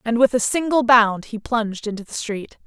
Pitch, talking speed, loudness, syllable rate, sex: 230 Hz, 225 wpm, -19 LUFS, 5.2 syllables/s, female